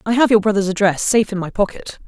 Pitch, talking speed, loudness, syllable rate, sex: 205 Hz, 260 wpm, -17 LUFS, 6.9 syllables/s, female